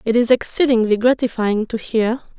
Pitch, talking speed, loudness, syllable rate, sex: 230 Hz, 150 wpm, -17 LUFS, 5.1 syllables/s, female